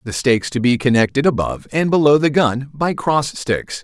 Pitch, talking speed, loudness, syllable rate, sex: 135 Hz, 205 wpm, -17 LUFS, 5.2 syllables/s, male